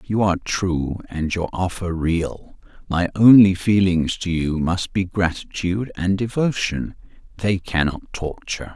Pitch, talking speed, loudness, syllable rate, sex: 90 Hz, 135 wpm, -20 LUFS, 4.2 syllables/s, male